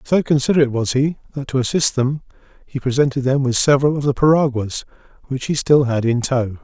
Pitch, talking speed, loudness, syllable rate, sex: 135 Hz, 200 wpm, -18 LUFS, 6.0 syllables/s, male